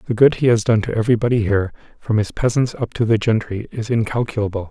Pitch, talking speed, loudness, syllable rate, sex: 110 Hz, 215 wpm, -19 LUFS, 6.6 syllables/s, male